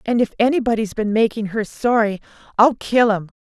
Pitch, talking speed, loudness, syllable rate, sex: 220 Hz, 175 wpm, -18 LUFS, 5.4 syllables/s, female